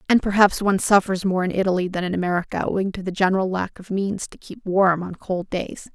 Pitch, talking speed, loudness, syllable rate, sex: 190 Hz, 230 wpm, -21 LUFS, 5.9 syllables/s, female